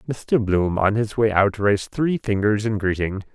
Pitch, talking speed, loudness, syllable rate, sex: 105 Hz, 195 wpm, -21 LUFS, 4.6 syllables/s, male